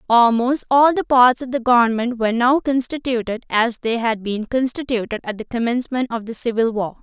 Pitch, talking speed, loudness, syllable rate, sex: 240 Hz, 190 wpm, -19 LUFS, 5.4 syllables/s, female